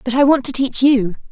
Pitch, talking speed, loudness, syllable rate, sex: 255 Hz, 275 wpm, -15 LUFS, 5.5 syllables/s, female